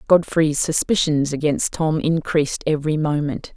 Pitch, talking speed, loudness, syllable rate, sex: 150 Hz, 120 wpm, -20 LUFS, 4.8 syllables/s, female